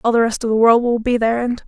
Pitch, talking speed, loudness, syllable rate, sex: 230 Hz, 360 wpm, -16 LUFS, 7.1 syllables/s, female